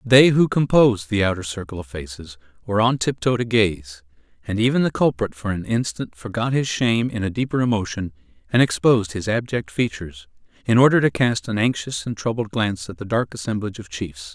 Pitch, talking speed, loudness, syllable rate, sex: 110 Hz, 195 wpm, -21 LUFS, 5.8 syllables/s, male